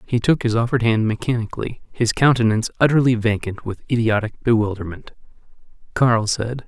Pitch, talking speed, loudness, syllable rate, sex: 115 Hz, 135 wpm, -19 LUFS, 5.8 syllables/s, male